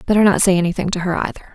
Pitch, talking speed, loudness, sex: 185 Hz, 275 wpm, -17 LUFS, female